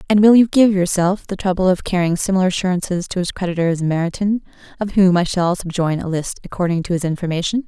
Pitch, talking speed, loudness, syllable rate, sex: 185 Hz, 210 wpm, -18 LUFS, 6.4 syllables/s, female